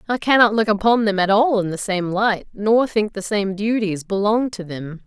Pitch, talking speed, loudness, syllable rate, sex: 205 Hz, 225 wpm, -19 LUFS, 4.8 syllables/s, female